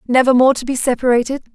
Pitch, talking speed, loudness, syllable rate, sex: 250 Hz, 195 wpm, -15 LUFS, 7.0 syllables/s, female